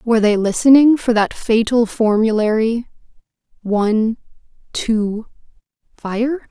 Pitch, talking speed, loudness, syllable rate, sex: 225 Hz, 65 wpm, -16 LUFS, 4.0 syllables/s, female